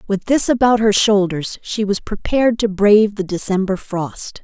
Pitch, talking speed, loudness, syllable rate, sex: 205 Hz, 175 wpm, -17 LUFS, 4.7 syllables/s, female